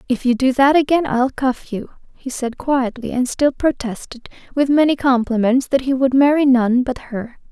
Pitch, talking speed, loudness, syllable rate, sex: 260 Hz, 190 wpm, -17 LUFS, 4.7 syllables/s, female